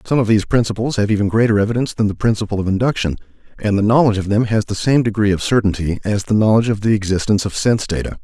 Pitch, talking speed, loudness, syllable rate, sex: 105 Hz, 240 wpm, -17 LUFS, 7.5 syllables/s, male